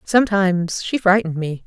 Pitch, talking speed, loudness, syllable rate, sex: 190 Hz, 145 wpm, -18 LUFS, 5.7 syllables/s, female